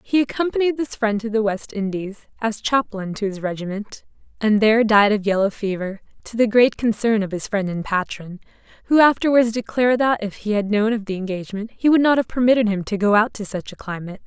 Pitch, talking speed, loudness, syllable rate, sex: 215 Hz, 220 wpm, -20 LUFS, 5.9 syllables/s, female